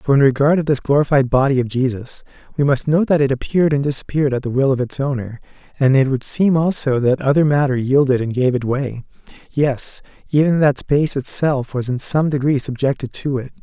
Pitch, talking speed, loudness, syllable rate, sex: 135 Hz, 210 wpm, -17 LUFS, 5.7 syllables/s, male